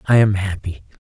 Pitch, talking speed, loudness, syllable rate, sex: 95 Hz, 175 wpm, -18 LUFS, 5.4 syllables/s, male